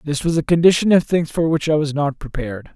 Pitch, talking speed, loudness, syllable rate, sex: 155 Hz, 260 wpm, -18 LUFS, 6.0 syllables/s, male